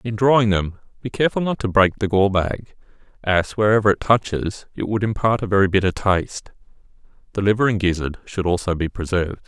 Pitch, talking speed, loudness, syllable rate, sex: 100 Hz, 190 wpm, -20 LUFS, 5.8 syllables/s, male